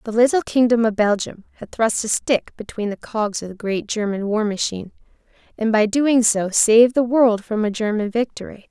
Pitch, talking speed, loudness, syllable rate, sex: 220 Hz, 200 wpm, -19 LUFS, 5.2 syllables/s, female